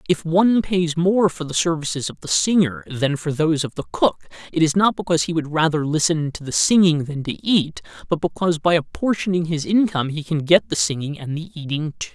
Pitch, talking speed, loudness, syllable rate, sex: 155 Hz, 220 wpm, -20 LUFS, 5.7 syllables/s, male